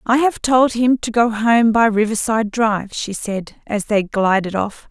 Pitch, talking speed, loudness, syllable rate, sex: 220 Hz, 195 wpm, -17 LUFS, 4.5 syllables/s, female